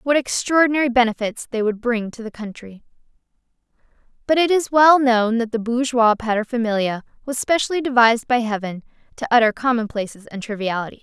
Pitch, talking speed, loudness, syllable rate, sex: 235 Hz, 150 wpm, -19 LUFS, 5.9 syllables/s, female